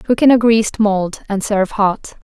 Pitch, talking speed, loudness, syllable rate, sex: 210 Hz, 210 wpm, -15 LUFS, 4.8 syllables/s, female